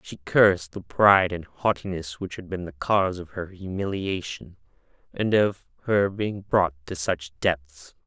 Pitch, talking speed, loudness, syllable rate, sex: 90 Hz, 165 wpm, -24 LUFS, 4.4 syllables/s, male